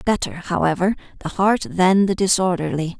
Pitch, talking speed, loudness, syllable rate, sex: 185 Hz, 140 wpm, -19 LUFS, 5.0 syllables/s, female